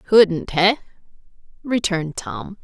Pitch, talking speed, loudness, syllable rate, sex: 180 Hz, 90 wpm, -20 LUFS, 3.9 syllables/s, female